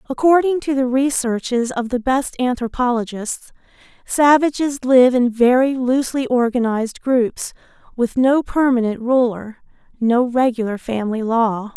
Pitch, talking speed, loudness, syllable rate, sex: 250 Hz, 115 wpm, -18 LUFS, 4.5 syllables/s, female